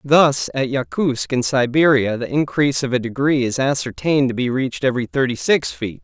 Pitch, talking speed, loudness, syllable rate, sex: 130 Hz, 190 wpm, -18 LUFS, 5.4 syllables/s, male